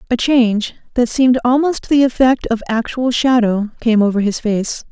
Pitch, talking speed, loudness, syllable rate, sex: 240 Hz, 170 wpm, -15 LUFS, 4.9 syllables/s, female